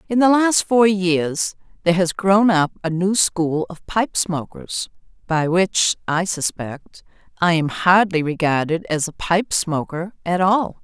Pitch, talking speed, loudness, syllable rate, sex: 180 Hz, 160 wpm, -19 LUFS, 4.0 syllables/s, female